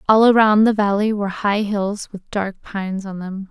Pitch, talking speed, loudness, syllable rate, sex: 205 Hz, 205 wpm, -18 LUFS, 4.9 syllables/s, female